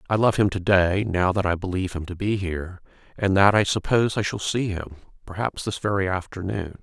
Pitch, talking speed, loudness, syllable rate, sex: 95 Hz, 220 wpm, -23 LUFS, 5.8 syllables/s, male